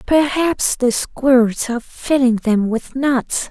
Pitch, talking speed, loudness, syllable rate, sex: 255 Hz, 135 wpm, -17 LUFS, 3.6 syllables/s, female